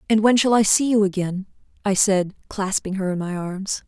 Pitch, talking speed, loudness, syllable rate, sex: 200 Hz, 215 wpm, -21 LUFS, 5.1 syllables/s, female